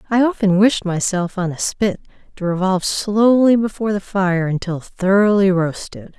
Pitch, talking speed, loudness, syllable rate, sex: 195 Hz, 155 wpm, -17 LUFS, 4.8 syllables/s, female